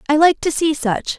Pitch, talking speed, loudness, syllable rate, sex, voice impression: 300 Hz, 250 wpm, -17 LUFS, 4.8 syllables/s, female, feminine, adult-like, tensed, slightly powerful, bright, clear, slightly nasal, intellectual, unique, lively, intense, sharp